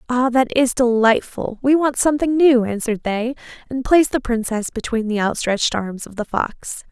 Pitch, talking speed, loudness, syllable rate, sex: 245 Hz, 180 wpm, -19 LUFS, 5.1 syllables/s, female